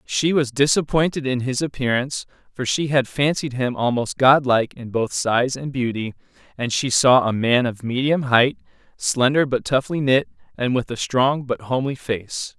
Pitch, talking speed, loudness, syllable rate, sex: 130 Hz, 180 wpm, -20 LUFS, 4.7 syllables/s, male